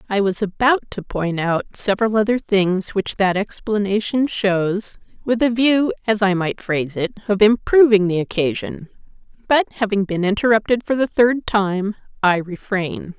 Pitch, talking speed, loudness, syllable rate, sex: 205 Hz, 160 wpm, -19 LUFS, 4.6 syllables/s, female